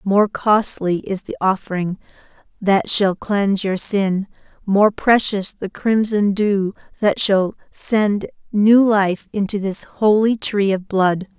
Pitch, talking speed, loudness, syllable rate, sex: 200 Hz, 135 wpm, -18 LUFS, 3.6 syllables/s, female